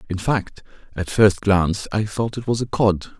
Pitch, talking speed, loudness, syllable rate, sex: 100 Hz, 205 wpm, -20 LUFS, 4.6 syllables/s, male